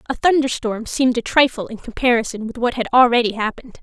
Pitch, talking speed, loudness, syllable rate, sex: 240 Hz, 190 wpm, -18 LUFS, 6.4 syllables/s, female